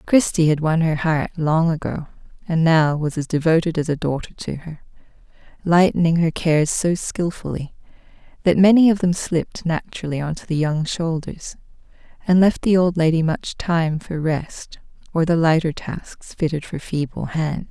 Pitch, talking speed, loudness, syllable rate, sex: 165 Hz, 170 wpm, -20 LUFS, 4.8 syllables/s, female